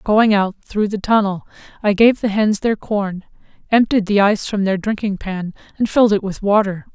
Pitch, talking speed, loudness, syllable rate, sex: 205 Hz, 200 wpm, -17 LUFS, 5.1 syllables/s, female